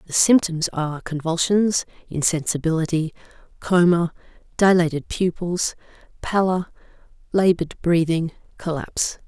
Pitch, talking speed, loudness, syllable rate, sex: 170 Hz, 80 wpm, -21 LUFS, 4.7 syllables/s, female